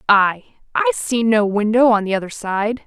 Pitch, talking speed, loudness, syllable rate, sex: 210 Hz, 170 wpm, -17 LUFS, 4.4 syllables/s, female